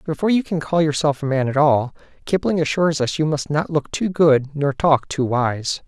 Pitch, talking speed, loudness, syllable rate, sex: 150 Hz, 225 wpm, -19 LUFS, 5.1 syllables/s, male